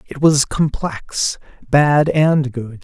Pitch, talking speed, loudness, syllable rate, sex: 140 Hz, 125 wpm, -17 LUFS, 2.9 syllables/s, male